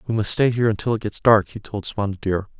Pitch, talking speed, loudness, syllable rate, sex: 105 Hz, 275 wpm, -21 LUFS, 6.4 syllables/s, male